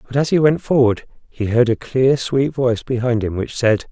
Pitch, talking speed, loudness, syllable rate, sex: 125 Hz, 230 wpm, -18 LUFS, 5.1 syllables/s, male